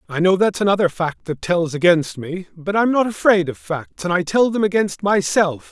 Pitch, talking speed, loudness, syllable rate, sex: 180 Hz, 220 wpm, -18 LUFS, 5.0 syllables/s, male